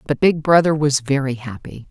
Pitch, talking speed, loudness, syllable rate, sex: 140 Hz, 190 wpm, -17 LUFS, 5.1 syllables/s, female